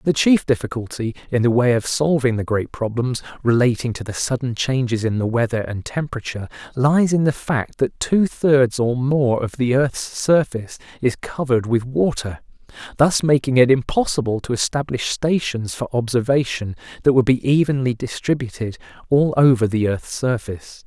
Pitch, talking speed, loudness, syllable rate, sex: 125 Hz, 165 wpm, -19 LUFS, 5.0 syllables/s, male